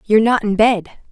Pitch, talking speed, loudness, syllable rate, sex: 215 Hz, 215 wpm, -15 LUFS, 6.2 syllables/s, female